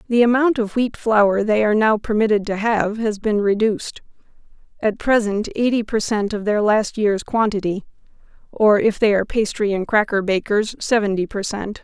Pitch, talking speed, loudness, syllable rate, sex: 210 Hz, 175 wpm, -19 LUFS, 5.0 syllables/s, female